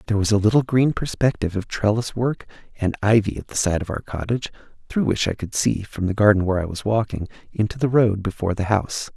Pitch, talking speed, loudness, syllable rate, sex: 105 Hz, 230 wpm, -22 LUFS, 6.4 syllables/s, male